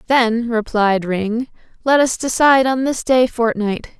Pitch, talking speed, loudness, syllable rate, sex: 240 Hz, 150 wpm, -17 LUFS, 4.1 syllables/s, female